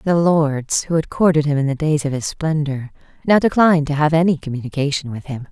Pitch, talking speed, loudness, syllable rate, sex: 150 Hz, 220 wpm, -18 LUFS, 5.7 syllables/s, female